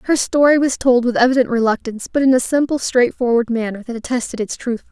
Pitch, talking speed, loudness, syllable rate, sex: 245 Hz, 205 wpm, -17 LUFS, 6.4 syllables/s, female